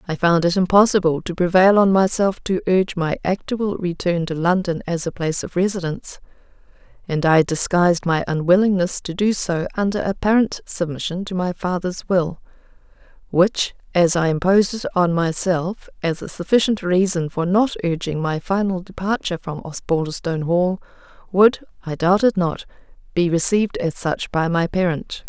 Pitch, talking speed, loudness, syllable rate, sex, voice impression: 180 Hz, 155 wpm, -20 LUFS, 5.1 syllables/s, female, feminine, adult-like, calm, elegant, sweet